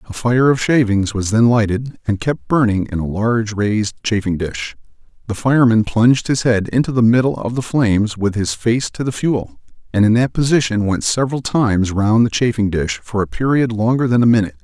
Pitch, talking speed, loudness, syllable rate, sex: 110 Hz, 210 wpm, -16 LUFS, 5.5 syllables/s, male